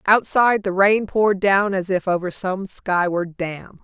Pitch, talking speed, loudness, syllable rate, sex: 190 Hz, 170 wpm, -19 LUFS, 4.3 syllables/s, female